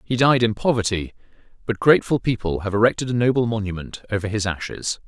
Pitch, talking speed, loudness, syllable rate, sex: 110 Hz, 180 wpm, -21 LUFS, 6.2 syllables/s, male